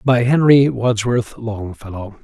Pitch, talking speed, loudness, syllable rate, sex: 115 Hz, 105 wpm, -16 LUFS, 3.8 syllables/s, male